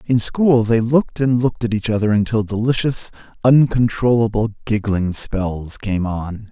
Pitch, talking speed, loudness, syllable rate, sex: 110 Hz, 145 wpm, -18 LUFS, 4.5 syllables/s, male